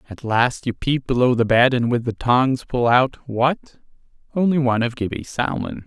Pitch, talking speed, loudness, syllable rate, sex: 125 Hz, 175 wpm, -20 LUFS, 4.8 syllables/s, male